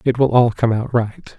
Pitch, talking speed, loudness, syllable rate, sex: 120 Hz, 260 wpm, -17 LUFS, 4.7 syllables/s, male